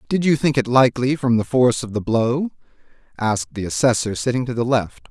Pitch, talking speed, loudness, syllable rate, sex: 120 Hz, 210 wpm, -19 LUFS, 5.9 syllables/s, male